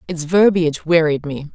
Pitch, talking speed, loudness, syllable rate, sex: 165 Hz, 155 wpm, -16 LUFS, 5.1 syllables/s, female